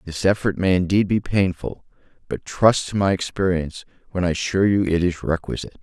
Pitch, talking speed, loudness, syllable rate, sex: 90 Hz, 185 wpm, -21 LUFS, 5.8 syllables/s, male